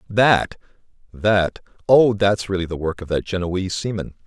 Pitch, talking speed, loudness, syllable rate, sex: 95 Hz, 140 wpm, -20 LUFS, 4.9 syllables/s, male